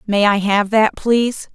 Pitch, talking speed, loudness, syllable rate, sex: 210 Hz, 195 wpm, -16 LUFS, 4.4 syllables/s, female